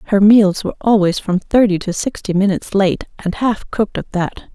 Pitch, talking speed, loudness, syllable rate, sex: 200 Hz, 200 wpm, -16 LUFS, 5.4 syllables/s, female